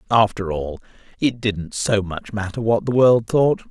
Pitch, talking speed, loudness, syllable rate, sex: 105 Hz, 180 wpm, -20 LUFS, 4.3 syllables/s, male